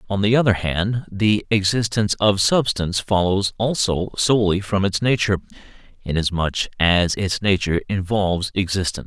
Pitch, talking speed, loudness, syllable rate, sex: 100 Hz, 130 wpm, -20 LUFS, 5.4 syllables/s, male